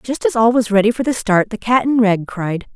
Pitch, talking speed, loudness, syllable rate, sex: 225 Hz, 285 wpm, -16 LUFS, 5.2 syllables/s, female